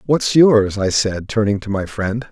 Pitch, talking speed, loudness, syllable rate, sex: 110 Hz, 210 wpm, -16 LUFS, 4.2 syllables/s, male